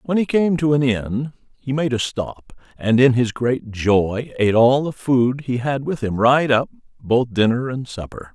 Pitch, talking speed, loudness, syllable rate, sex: 125 Hz, 210 wpm, -19 LUFS, 4.4 syllables/s, male